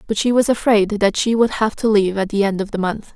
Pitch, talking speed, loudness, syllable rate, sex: 210 Hz, 305 wpm, -17 LUFS, 6.0 syllables/s, female